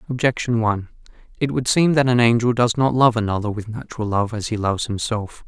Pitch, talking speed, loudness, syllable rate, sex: 115 Hz, 210 wpm, -20 LUFS, 6.1 syllables/s, male